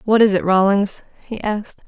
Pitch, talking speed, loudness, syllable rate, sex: 205 Hz, 190 wpm, -18 LUFS, 5.1 syllables/s, female